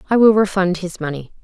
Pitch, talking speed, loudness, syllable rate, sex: 185 Hz, 210 wpm, -17 LUFS, 6.0 syllables/s, female